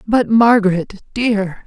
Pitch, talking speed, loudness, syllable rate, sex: 210 Hz, 110 wpm, -15 LUFS, 3.7 syllables/s, female